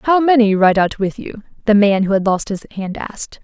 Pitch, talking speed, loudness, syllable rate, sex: 210 Hz, 245 wpm, -16 LUFS, 5.3 syllables/s, female